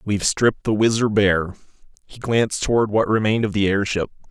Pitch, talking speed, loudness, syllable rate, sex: 105 Hz, 180 wpm, -19 LUFS, 6.0 syllables/s, male